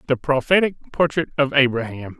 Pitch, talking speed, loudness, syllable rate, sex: 135 Hz, 135 wpm, -19 LUFS, 5.7 syllables/s, male